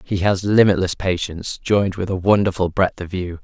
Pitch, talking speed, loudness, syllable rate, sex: 95 Hz, 190 wpm, -19 LUFS, 5.4 syllables/s, male